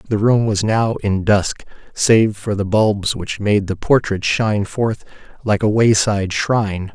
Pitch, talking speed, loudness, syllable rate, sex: 105 Hz, 175 wpm, -17 LUFS, 4.2 syllables/s, male